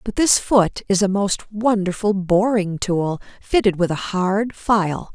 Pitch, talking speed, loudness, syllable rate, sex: 200 Hz, 165 wpm, -19 LUFS, 3.8 syllables/s, female